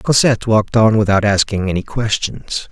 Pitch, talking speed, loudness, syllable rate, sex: 105 Hz, 155 wpm, -15 LUFS, 5.4 syllables/s, male